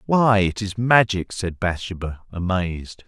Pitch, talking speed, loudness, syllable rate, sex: 100 Hz, 135 wpm, -21 LUFS, 4.2 syllables/s, male